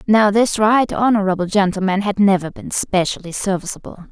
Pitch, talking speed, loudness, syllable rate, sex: 200 Hz, 145 wpm, -17 LUFS, 5.3 syllables/s, female